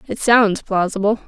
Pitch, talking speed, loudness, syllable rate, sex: 210 Hz, 140 wpm, -17 LUFS, 4.7 syllables/s, female